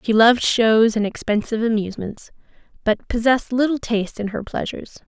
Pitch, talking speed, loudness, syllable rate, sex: 225 Hz, 150 wpm, -20 LUFS, 5.9 syllables/s, female